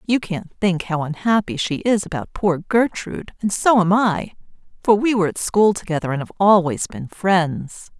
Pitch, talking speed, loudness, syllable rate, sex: 190 Hz, 190 wpm, -19 LUFS, 4.8 syllables/s, female